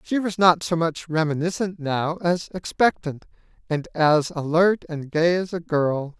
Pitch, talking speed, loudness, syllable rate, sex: 165 Hz, 165 wpm, -22 LUFS, 4.2 syllables/s, male